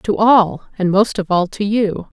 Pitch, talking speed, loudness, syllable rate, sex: 195 Hz, 220 wpm, -16 LUFS, 4.0 syllables/s, female